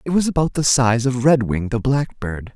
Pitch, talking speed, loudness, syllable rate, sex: 130 Hz, 210 wpm, -18 LUFS, 4.9 syllables/s, male